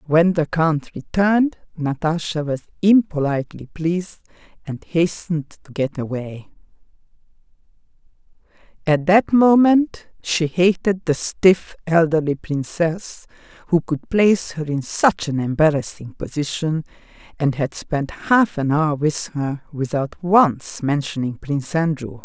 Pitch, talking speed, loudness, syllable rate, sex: 160 Hz, 120 wpm, -20 LUFS, 4.2 syllables/s, female